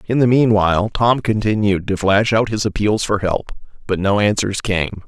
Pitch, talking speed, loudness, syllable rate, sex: 105 Hz, 190 wpm, -17 LUFS, 4.9 syllables/s, male